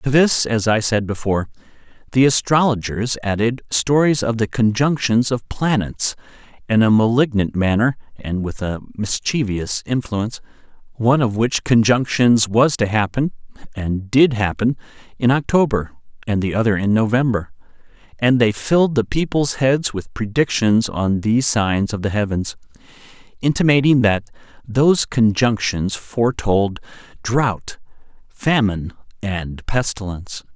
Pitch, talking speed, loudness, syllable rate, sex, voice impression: 115 Hz, 125 wpm, -18 LUFS, 4.6 syllables/s, male, masculine, adult-like, thick, tensed, powerful, slightly hard, clear, fluent, calm, slightly mature, friendly, reassuring, wild, lively, slightly kind